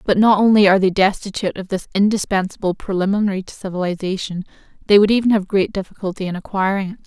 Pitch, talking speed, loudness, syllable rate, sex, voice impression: 195 Hz, 180 wpm, -18 LUFS, 6.9 syllables/s, female, feminine, adult-like, slightly intellectual, slightly calm, slightly elegant, slightly sweet